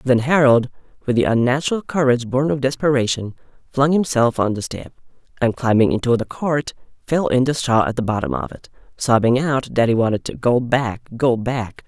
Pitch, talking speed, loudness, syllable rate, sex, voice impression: 125 Hz, 190 wpm, -19 LUFS, 5.3 syllables/s, male, very masculine, slightly adult-like, slightly thick, tensed, slightly powerful, bright, soft, clear, fluent, raspy, cool, slightly intellectual, very refreshing, sincere, calm, slightly mature, friendly, reassuring, unique, slightly elegant, wild, slightly sweet, lively, kind, slightly intense